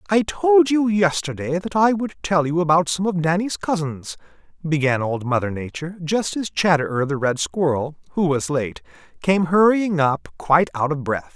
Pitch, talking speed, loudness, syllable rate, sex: 165 Hz, 180 wpm, -20 LUFS, 4.9 syllables/s, male